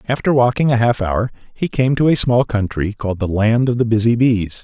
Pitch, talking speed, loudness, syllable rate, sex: 115 Hz, 235 wpm, -16 LUFS, 5.4 syllables/s, male